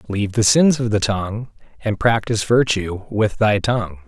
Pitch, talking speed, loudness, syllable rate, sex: 110 Hz, 175 wpm, -18 LUFS, 5.0 syllables/s, male